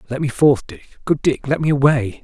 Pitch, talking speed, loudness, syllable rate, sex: 135 Hz, 215 wpm, -17 LUFS, 5.1 syllables/s, male